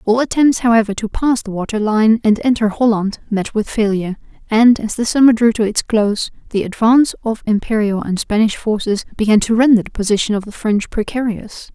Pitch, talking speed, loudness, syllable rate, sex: 220 Hz, 195 wpm, -16 LUFS, 5.6 syllables/s, female